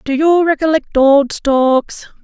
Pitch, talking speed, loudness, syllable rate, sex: 290 Hz, 135 wpm, -13 LUFS, 3.9 syllables/s, female